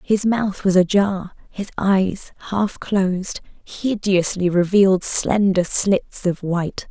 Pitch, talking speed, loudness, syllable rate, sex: 190 Hz, 120 wpm, -19 LUFS, 3.5 syllables/s, female